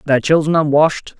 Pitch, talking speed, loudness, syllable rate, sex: 150 Hz, 150 wpm, -14 LUFS, 5.9 syllables/s, male